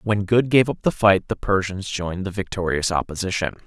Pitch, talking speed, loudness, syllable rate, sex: 100 Hz, 195 wpm, -21 LUFS, 5.5 syllables/s, male